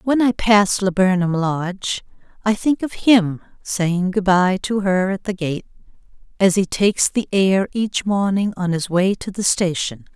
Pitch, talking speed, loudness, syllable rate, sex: 190 Hz, 175 wpm, -19 LUFS, 4.2 syllables/s, female